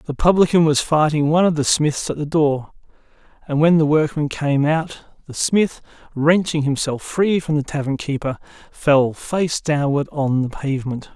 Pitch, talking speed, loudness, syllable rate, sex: 150 Hz, 170 wpm, -19 LUFS, 4.6 syllables/s, male